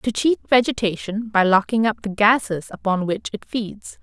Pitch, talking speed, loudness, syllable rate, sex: 215 Hz, 180 wpm, -20 LUFS, 4.6 syllables/s, female